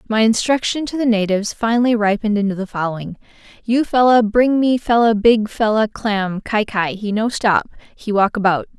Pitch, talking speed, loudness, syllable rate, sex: 220 Hz, 170 wpm, -17 LUFS, 5.3 syllables/s, female